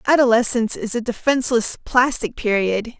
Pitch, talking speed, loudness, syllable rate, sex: 235 Hz, 120 wpm, -19 LUFS, 5.3 syllables/s, female